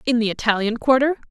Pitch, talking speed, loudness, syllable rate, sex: 240 Hz, 185 wpm, -19 LUFS, 6.7 syllables/s, female